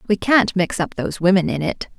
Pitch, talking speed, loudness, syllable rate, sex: 190 Hz, 240 wpm, -19 LUFS, 5.7 syllables/s, female